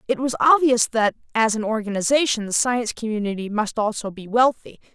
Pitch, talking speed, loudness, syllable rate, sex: 225 Hz, 170 wpm, -21 LUFS, 5.7 syllables/s, female